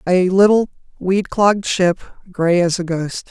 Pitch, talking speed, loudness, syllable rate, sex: 185 Hz, 165 wpm, -16 LUFS, 4.3 syllables/s, female